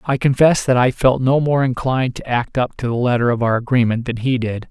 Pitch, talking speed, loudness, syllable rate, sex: 125 Hz, 255 wpm, -17 LUFS, 5.6 syllables/s, male